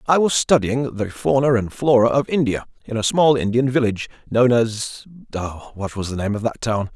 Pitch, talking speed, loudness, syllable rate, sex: 120 Hz, 200 wpm, -20 LUFS, 5.1 syllables/s, male